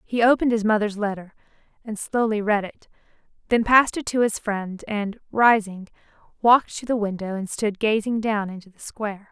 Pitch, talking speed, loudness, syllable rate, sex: 215 Hz, 180 wpm, -22 LUFS, 5.3 syllables/s, female